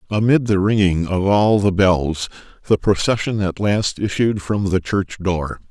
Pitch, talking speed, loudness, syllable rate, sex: 100 Hz, 170 wpm, -18 LUFS, 4.2 syllables/s, male